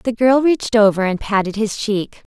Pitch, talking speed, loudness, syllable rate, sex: 220 Hz, 200 wpm, -17 LUFS, 5.0 syllables/s, female